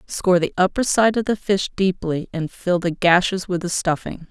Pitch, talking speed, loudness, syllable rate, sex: 180 Hz, 210 wpm, -20 LUFS, 5.0 syllables/s, female